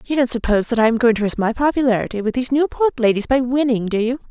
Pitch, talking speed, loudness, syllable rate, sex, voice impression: 245 Hz, 265 wpm, -18 LUFS, 7.0 syllables/s, female, feminine, adult-like, slightly relaxed, powerful, slightly bright, fluent, raspy, intellectual, elegant, lively, slightly strict, intense, sharp